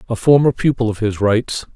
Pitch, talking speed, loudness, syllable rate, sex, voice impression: 115 Hz, 205 wpm, -16 LUFS, 5.8 syllables/s, male, very masculine, very adult-like, slightly thick, cool, sincere, slightly calm, friendly